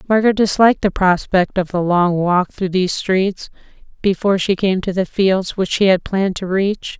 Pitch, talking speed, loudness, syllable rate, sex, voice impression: 190 Hz, 195 wpm, -17 LUFS, 5.1 syllables/s, female, very feminine, very adult-like, thin, tensed, slightly weak, dark, soft, clear, slightly fluent, slightly raspy, cool, slightly intellectual, slightly refreshing, slightly sincere, very calm, friendly, slightly reassuring, unique, elegant, slightly wild, very sweet, slightly lively, kind, modest